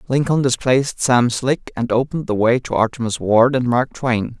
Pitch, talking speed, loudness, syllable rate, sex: 125 Hz, 190 wpm, -18 LUFS, 5.1 syllables/s, male